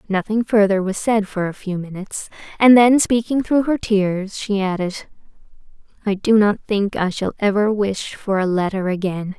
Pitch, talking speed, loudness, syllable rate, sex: 205 Hz, 180 wpm, -18 LUFS, 4.7 syllables/s, female